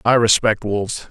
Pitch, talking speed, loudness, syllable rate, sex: 110 Hz, 165 wpm, -17 LUFS, 5.0 syllables/s, male